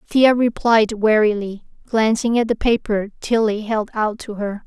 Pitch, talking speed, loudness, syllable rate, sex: 220 Hz, 155 wpm, -18 LUFS, 4.3 syllables/s, female